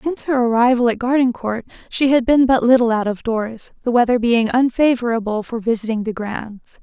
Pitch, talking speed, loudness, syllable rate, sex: 240 Hz, 185 wpm, -17 LUFS, 5.3 syllables/s, female